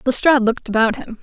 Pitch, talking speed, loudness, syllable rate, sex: 240 Hz, 195 wpm, -17 LUFS, 7.2 syllables/s, female